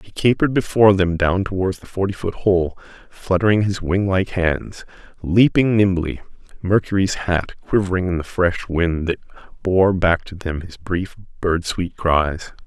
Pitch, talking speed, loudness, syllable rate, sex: 90 Hz, 145 wpm, -19 LUFS, 4.6 syllables/s, male